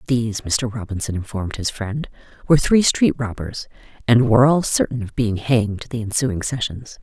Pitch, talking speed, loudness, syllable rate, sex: 115 Hz, 170 wpm, -20 LUFS, 5.3 syllables/s, female